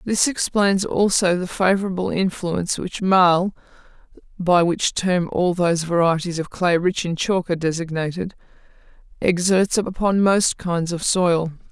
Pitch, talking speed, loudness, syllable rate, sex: 180 Hz, 140 wpm, -20 LUFS, 2.7 syllables/s, female